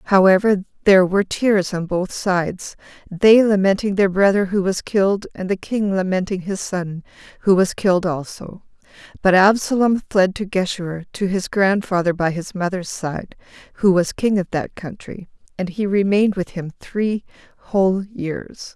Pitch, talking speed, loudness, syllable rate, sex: 190 Hz, 160 wpm, -19 LUFS, 4.6 syllables/s, female